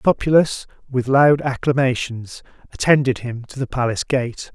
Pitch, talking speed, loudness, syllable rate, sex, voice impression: 130 Hz, 145 wpm, -19 LUFS, 5.4 syllables/s, male, masculine, very adult-like, slightly thick, slightly soft, sincere, calm, slightly friendly